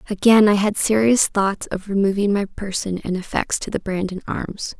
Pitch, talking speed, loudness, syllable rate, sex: 200 Hz, 190 wpm, -20 LUFS, 4.8 syllables/s, female